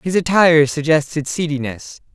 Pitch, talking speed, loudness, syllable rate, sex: 155 Hz, 110 wpm, -16 LUFS, 5.0 syllables/s, male